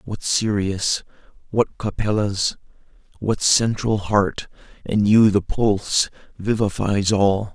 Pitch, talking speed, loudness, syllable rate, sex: 105 Hz, 85 wpm, -20 LUFS, 3.5 syllables/s, male